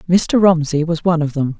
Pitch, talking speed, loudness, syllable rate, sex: 165 Hz, 225 wpm, -16 LUFS, 5.7 syllables/s, female